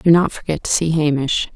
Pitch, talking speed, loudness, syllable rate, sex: 155 Hz, 230 wpm, -18 LUFS, 5.5 syllables/s, female